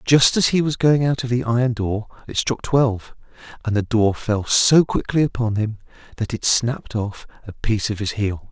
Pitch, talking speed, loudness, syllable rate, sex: 115 Hz, 210 wpm, -20 LUFS, 5.1 syllables/s, male